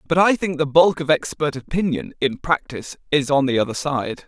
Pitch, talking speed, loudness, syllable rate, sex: 150 Hz, 210 wpm, -20 LUFS, 5.4 syllables/s, male